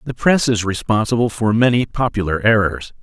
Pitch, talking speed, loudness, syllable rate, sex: 110 Hz, 160 wpm, -17 LUFS, 5.3 syllables/s, male